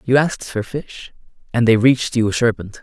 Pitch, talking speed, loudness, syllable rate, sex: 120 Hz, 215 wpm, -18 LUFS, 5.6 syllables/s, male